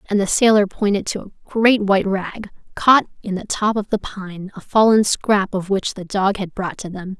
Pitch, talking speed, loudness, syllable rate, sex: 200 Hz, 225 wpm, -18 LUFS, 4.8 syllables/s, female